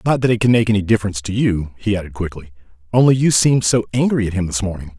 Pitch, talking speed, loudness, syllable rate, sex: 105 Hz, 255 wpm, -17 LUFS, 7.2 syllables/s, male